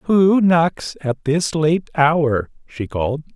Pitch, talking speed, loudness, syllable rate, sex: 155 Hz, 145 wpm, -18 LUFS, 3.1 syllables/s, male